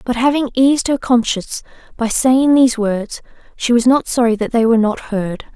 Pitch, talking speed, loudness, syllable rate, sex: 240 Hz, 195 wpm, -15 LUFS, 5.3 syllables/s, female